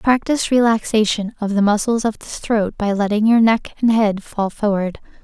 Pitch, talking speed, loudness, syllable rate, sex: 215 Hz, 185 wpm, -18 LUFS, 4.9 syllables/s, female